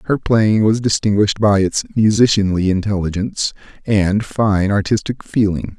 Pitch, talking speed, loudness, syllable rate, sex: 105 Hz, 125 wpm, -16 LUFS, 4.8 syllables/s, male